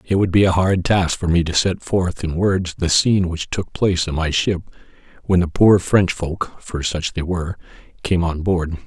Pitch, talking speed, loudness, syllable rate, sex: 90 Hz, 225 wpm, -19 LUFS, 4.6 syllables/s, male